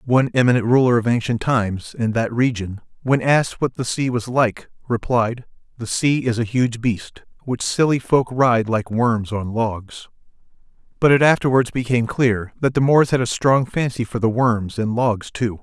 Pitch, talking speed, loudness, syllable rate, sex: 120 Hz, 190 wpm, -19 LUFS, 4.7 syllables/s, male